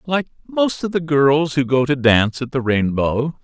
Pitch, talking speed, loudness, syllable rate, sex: 145 Hz, 210 wpm, -18 LUFS, 4.5 syllables/s, male